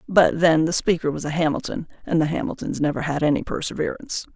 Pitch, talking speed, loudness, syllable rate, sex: 160 Hz, 195 wpm, -22 LUFS, 6.4 syllables/s, female